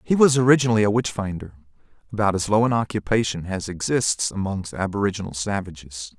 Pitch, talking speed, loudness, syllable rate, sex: 105 Hz, 145 wpm, -22 LUFS, 6.0 syllables/s, male